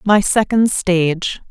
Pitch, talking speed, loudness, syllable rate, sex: 195 Hz, 120 wpm, -16 LUFS, 3.7 syllables/s, female